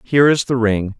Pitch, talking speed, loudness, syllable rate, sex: 120 Hz, 240 wpm, -16 LUFS, 5.6 syllables/s, male